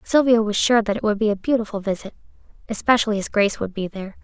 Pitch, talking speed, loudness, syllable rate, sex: 215 Hz, 225 wpm, -21 LUFS, 7.0 syllables/s, female